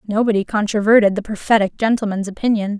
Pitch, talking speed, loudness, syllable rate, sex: 210 Hz, 130 wpm, -17 LUFS, 6.4 syllables/s, female